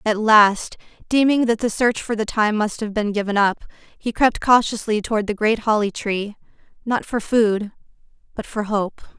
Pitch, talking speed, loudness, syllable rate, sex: 215 Hz, 185 wpm, -19 LUFS, 4.6 syllables/s, female